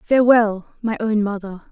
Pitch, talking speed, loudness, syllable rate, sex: 215 Hz, 140 wpm, -18 LUFS, 5.0 syllables/s, female